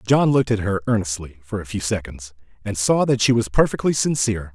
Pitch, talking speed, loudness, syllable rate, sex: 105 Hz, 210 wpm, -20 LUFS, 6.0 syllables/s, male